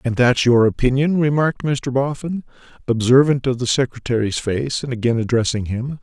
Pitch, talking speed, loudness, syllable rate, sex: 130 Hz, 160 wpm, -18 LUFS, 5.3 syllables/s, male